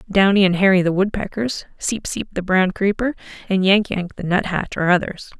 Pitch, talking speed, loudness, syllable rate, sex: 195 Hz, 190 wpm, -19 LUFS, 5.3 syllables/s, female